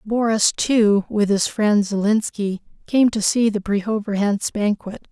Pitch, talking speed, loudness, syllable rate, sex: 210 Hz, 140 wpm, -19 LUFS, 3.9 syllables/s, female